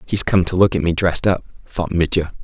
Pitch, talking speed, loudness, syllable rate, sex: 90 Hz, 245 wpm, -17 LUFS, 5.9 syllables/s, male